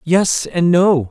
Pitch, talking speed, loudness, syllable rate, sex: 170 Hz, 165 wpm, -15 LUFS, 3.0 syllables/s, male